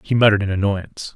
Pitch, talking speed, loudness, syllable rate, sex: 100 Hz, 210 wpm, -18 LUFS, 7.6 syllables/s, male